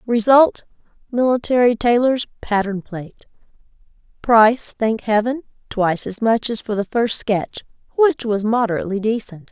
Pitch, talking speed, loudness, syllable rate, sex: 225 Hz, 125 wpm, -18 LUFS, 4.9 syllables/s, female